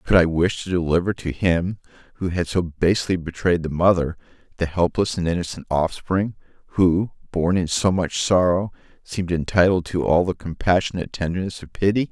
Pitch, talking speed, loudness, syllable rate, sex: 90 Hz, 170 wpm, -21 LUFS, 5.3 syllables/s, male